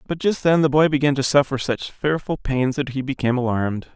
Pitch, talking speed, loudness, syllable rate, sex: 135 Hz, 230 wpm, -20 LUFS, 5.8 syllables/s, male